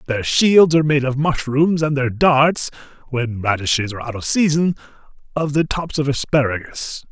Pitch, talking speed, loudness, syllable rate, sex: 140 Hz, 170 wpm, -18 LUFS, 3.7 syllables/s, male